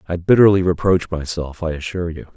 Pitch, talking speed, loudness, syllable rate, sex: 85 Hz, 180 wpm, -18 LUFS, 6.1 syllables/s, male